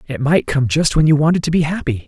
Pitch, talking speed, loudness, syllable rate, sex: 150 Hz, 290 wpm, -16 LUFS, 6.2 syllables/s, male